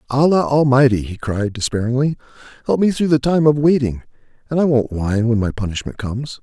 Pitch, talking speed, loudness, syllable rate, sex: 125 Hz, 185 wpm, -17 LUFS, 5.9 syllables/s, male